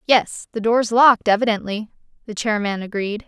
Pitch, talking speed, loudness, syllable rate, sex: 220 Hz, 145 wpm, -19 LUFS, 5.2 syllables/s, female